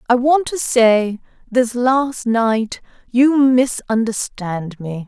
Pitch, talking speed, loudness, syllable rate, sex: 235 Hz, 95 wpm, -17 LUFS, 3.0 syllables/s, female